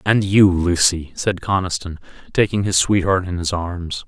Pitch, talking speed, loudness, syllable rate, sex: 90 Hz, 160 wpm, -18 LUFS, 4.5 syllables/s, male